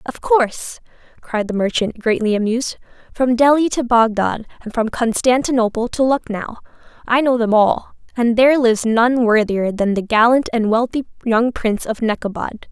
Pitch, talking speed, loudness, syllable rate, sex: 230 Hz, 160 wpm, -17 LUFS, 5.1 syllables/s, female